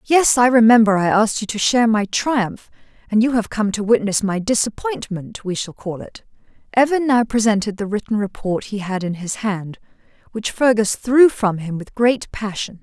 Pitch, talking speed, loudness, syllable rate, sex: 215 Hz, 190 wpm, -18 LUFS, 4.9 syllables/s, female